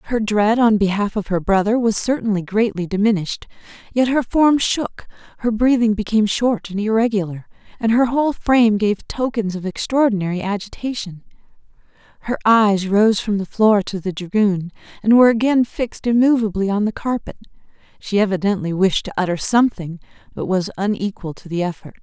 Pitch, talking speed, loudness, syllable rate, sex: 210 Hz, 160 wpm, -18 LUFS, 5.5 syllables/s, female